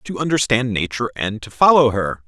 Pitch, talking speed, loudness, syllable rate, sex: 115 Hz, 185 wpm, -18 LUFS, 5.7 syllables/s, male